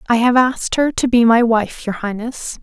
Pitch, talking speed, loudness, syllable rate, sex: 235 Hz, 230 wpm, -16 LUFS, 4.9 syllables/s, female